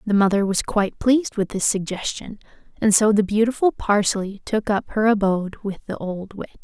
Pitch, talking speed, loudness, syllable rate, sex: 205 Hz, 190 wpm, -21 LUFS, 5.3 syllables/s, female